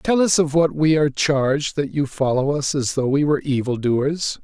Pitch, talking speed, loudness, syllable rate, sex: 145 Hz, 230 wpm, -19 LUFS, 5.0 syllables/s, male